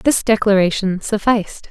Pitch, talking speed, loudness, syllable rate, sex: 205 Hz, 105 wpm, -16 LUFS, 4.8 syllables/s, female